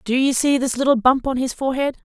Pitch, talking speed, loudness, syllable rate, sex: 260 Hz, 255 wpm, -19 LUFS, 6.4 syllables/s, female